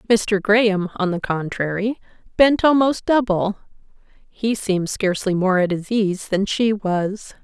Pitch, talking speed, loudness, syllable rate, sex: 205 Hz, 135 wpm, -19 LUFS, 4.2 syllables/s, female